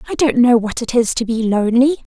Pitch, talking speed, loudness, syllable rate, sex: 240 Hz, 250 wpm, -15 LUFS, 6.3 syllables/s, female